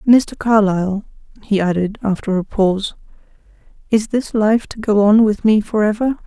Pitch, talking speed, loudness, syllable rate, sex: 210 Hz, 155 wpm, -16 LUFS, 4.9 syllables/s, female